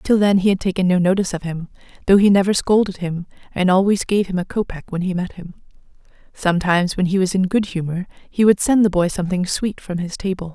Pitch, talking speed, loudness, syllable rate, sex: 185 Hz, 235 wpm, -18 LUFS, 6.2 syllables/s, female